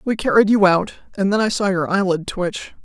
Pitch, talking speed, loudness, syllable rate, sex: 195 Hz, 230 wpm, -18 LUFS, 5.3 syllables/s, female